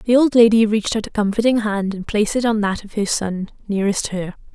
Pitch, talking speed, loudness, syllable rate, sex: 210 Hz, 240 wpm, -18 LUFS, 5.9 syllables/s, female